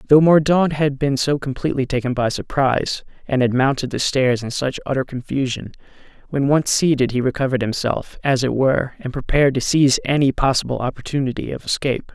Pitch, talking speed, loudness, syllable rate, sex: 135 Hz, 180 wpm, -19 LUFS, 5.9 syllables/s, male